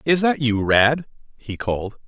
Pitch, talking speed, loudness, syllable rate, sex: 125 Hz, 175 wpm, -20 LUFS, 4.3 syllables/s, male